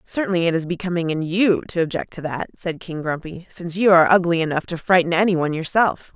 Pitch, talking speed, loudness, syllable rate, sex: 170 Hz, 215 wpm, -20 LUFS, 6.1 syllables/s, female